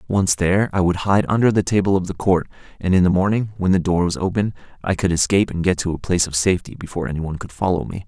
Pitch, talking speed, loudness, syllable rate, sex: 95 Hz, 260 wpm, -19 LUFS, 7.1 syllables/s, male